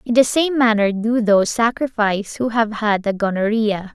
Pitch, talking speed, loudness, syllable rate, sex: 220 Hz, 180 wpm, -18 LUFS, 5.0 syllables/s, female